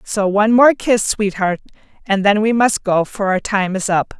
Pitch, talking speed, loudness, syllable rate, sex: 205 Hz, 215 wpm, -16 LUFS, 4.8 syllables/s, female